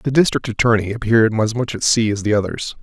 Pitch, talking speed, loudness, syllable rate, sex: 115 Hz, 235 wpm, -17 LUFS, 6.2 syllables/s, male